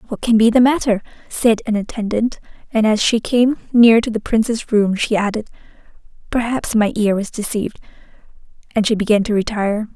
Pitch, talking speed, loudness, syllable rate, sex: 220 Hz, 175 wpm, -17 LUFS, 5.6 syllables/s, female